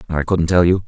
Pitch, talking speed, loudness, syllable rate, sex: 85 Hz, 275 wpm, -16 LUFS, 5.8 syllables/s, male